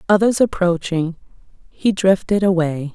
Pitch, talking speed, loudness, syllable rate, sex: 185 Hz, 100 wpm, -18 LUFS, 4.4 syllables/s, female